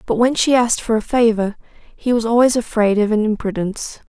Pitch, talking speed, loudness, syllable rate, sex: 225 Hz, 205 wpm, -17 LUFS, 5.8 syllables/s, female